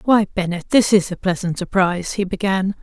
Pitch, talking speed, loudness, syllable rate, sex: 190 Hz, 190 wpm, -19 LUFS, 5.6 syllables/s, female